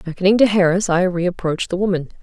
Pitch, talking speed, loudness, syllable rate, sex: 185 Hz, 190 wpm, -17 LUFS, 6.5 syllables/s, female